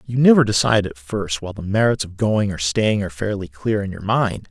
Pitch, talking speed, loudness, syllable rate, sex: 100 Hz, 240 wpm, -19 LUFS, 5.7 syllables/s, male